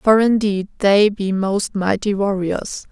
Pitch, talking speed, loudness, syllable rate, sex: 200 Hz, 145 wpm, -18 LUFS, 3.7 syllables/s, female